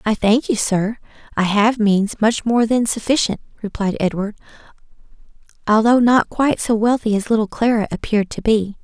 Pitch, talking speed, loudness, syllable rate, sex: 220 Hz, 165 wpm, -18 LUFS, 5.2 syllables/s, female